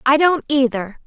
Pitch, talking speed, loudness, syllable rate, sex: 265 Hz, 170 wpm, -17 LUFS, 4.4 syllables/s, female